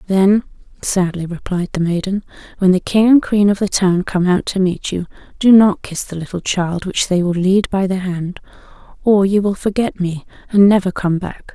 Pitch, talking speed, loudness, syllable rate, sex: 190 Hz, 210 wpm, -16 LUFS, 4.9 syllables/s, female